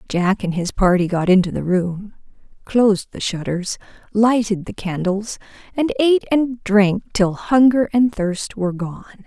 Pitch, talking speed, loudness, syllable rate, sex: 205 Hz, 155 wpm, -18 LUFS, 4.4 syllables/s, female